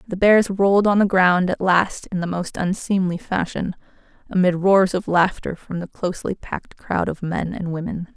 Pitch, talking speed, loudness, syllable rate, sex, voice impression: 185 Hz, 190 wpm, -20 LUFS, 4.8 syllables/s, female, feminine, adult-like, relaxed, weak, soft, raspy, intellectual, calm, reassuring, elegant, slightly sharp, modest